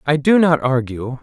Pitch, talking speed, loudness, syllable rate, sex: 140 Hz, 195 wpm, -16 LUFS, 4.5 syllables/s, male